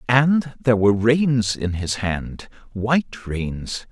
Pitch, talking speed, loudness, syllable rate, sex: 115 Hz, 125 wpm, -21 LUFS, 3.5 syllables/s, male